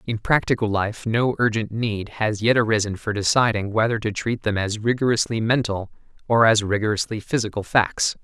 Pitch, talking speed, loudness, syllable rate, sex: 110 Hz, 170 wpm, -21 LUFS, 5.2 syllables/s, male